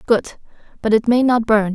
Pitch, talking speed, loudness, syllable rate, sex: 225 Hz, 205 wpm, -17 LUFS, 5.0 syllables/s, female